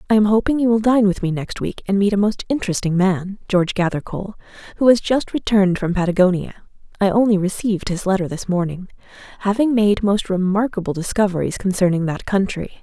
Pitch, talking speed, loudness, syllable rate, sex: 195 Hz, 180 wpm, -19 LUFS, 6.1 syllables/s, female